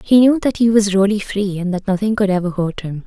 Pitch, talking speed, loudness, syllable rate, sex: 200 Hz, 275 wpm, -16 LUFS, 5.7 syllables/s, female